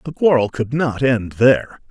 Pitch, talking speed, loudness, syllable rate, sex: 125 Hz, 190 wpm, -17 LUFS, 4.7 syllables/s, male